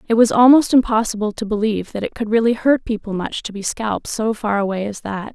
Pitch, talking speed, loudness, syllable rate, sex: 220 Hz, 235 wpm, -18 LUFS, 6.0 syllables/s, female